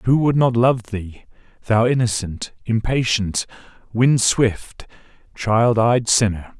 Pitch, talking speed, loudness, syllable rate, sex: 115 Hz, 120 wpm, -18 LUFS, 3.5 syllables/s, male